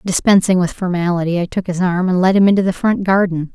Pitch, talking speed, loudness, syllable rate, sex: 185 Hz, 235 wpm, -15 LUFS, 6.1 syllables/s, female